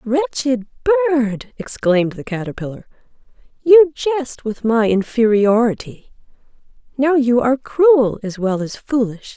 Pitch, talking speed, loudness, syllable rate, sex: 240 Hz, 110 wpm, -17 LUFS, 4.3 syllables/s, female